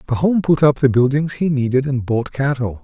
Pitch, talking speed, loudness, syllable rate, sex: 135 Hz, 210 wpm, -17 LUFS, 5.2 syllables/s, male